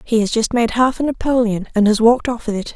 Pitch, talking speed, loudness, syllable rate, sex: 230 Hz, 285 wpm, -17 LUFS, 6.2 syllables/s, female